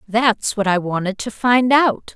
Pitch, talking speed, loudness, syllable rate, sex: 220 Hz, 195 wpm, -17 LUFS, 4.0 syllables/s, female